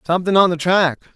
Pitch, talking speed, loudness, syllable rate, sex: 175 Hz, 210 wpm, -16 LUFS, 6.5 syllables/s, male